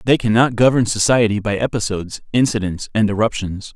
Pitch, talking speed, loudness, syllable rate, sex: 110 Hz, 145 wpm, -17 LUFS, 5.7 syllables/s, male